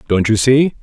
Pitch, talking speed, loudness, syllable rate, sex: 115 Hz, 220 wpm, -13 LUFS, 4.9 syllables/s, male